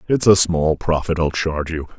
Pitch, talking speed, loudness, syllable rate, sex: 80 Hz, 210 wpm, -18 LUFS, 5.2 syllables/s, male